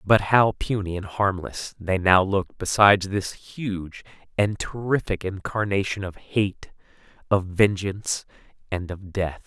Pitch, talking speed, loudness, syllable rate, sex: 100 Hz, 135 wpm, -24 LUFS, 4.2 syllables/s, male